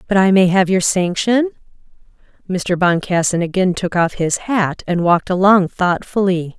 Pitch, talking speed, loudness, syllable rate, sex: 185 Hz, 155 wpm, -16 LUFS, 4.6 syllables/s, female